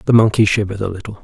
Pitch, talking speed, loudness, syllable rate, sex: 105 Hz, 245 wpm, -16 LUFS, 8.6 syllables/s, male